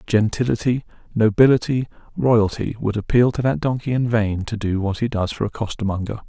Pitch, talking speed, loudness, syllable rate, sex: 110 Hz, 170 wpm, -20 LUFS, 5.5 syllables/s, male